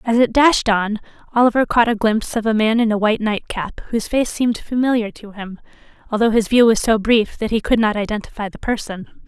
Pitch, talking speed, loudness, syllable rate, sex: 220 Hz, 220 wpm, -18 LUFS, 5.9 syllables/s, female